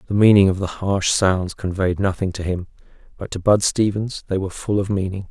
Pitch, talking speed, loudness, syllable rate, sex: 95 Hz, 215 wpm, -20 LUFS, 5.5 syllables/s, male